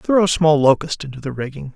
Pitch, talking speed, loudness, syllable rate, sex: 150 Hz, 240 wpm, -18 LUFS, 5.9 syllables/s, male